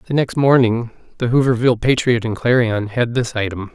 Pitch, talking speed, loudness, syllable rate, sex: 120 Hz, 175 wpm, -17 LUFS, 5.5 syllables/s, male